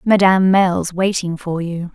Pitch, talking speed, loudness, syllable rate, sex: 180 Hz, 155 wpm, -16 LUFS, 4.9 syllables/s, female